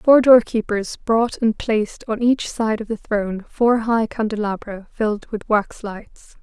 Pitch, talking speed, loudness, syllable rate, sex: 220 Hz, 170 wpm, -19 LUFS, 4.2 syllables/s, female